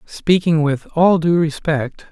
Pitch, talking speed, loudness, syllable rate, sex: 160 Hz, 140 wpm, -17 LUFS, 3.7 syllables/s, male